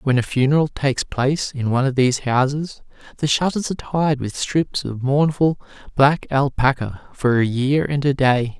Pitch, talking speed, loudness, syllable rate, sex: 135 Hz, 180 wpm, -19 LUFS, 4.9 syllables/s, male